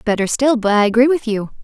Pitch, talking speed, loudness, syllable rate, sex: 230 Hz, 260 wpm, -15 LUFS, 6.2 syllables/s, female